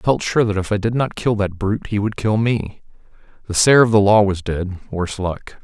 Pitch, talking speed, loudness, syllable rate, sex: 105 Hz, 255 wpm, -18 LUFS, 5.4 syllables/s, male